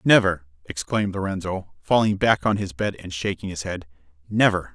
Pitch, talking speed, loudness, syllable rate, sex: 95 Hz, 150 wpm, -23 LUFS, 5.3 syllables/s, male